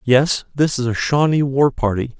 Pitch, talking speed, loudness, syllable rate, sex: 135 Hz, 190 wpm, -18 LUFS, 4.5 syllables/s, male